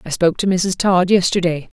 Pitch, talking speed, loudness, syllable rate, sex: 180 Hz, 200 wpm, -16 LUFS, 5.5 syllables/s, female